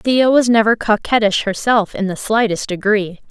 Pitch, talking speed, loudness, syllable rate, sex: 215 Hz, 165 wpm, -15 LUFS, 4.7 syllables/s, female